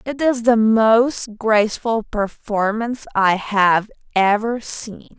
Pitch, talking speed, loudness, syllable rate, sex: 220 Hz, 115 wpm, -18 LUFS, 3.5 syllables/s, female